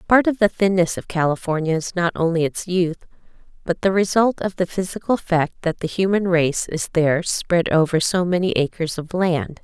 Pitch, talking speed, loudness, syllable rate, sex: 175 Hz, 195 wpm, -20 LUFS, 5.1 syllables/s, female